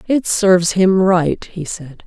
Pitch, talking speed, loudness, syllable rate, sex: 185 Hz, 175 wpm, -15 LUFS, 3.7 syllables/s, female